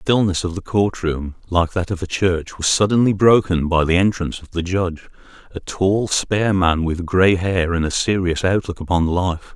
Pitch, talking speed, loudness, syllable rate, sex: 90 Hz, 205 wpm, -18 LUFS, 5.0 syllables/s, male